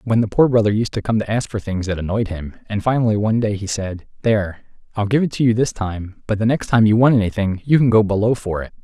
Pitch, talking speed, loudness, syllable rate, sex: 105 Hz, 280 wpm, -18 LUFS, 6.3 syllables/s, male